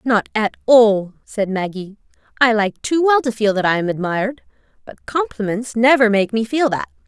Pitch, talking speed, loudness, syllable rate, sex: 225 Hz, 185 wpm, -17 LUFS, 4.9 syllables/s, female